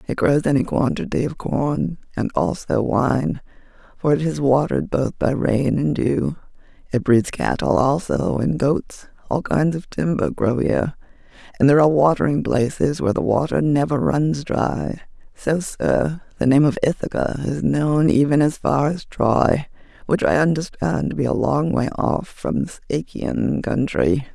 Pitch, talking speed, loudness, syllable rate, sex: 145 Hz, 165 wpm, -20 LUFS, 4.4 syllables/s, female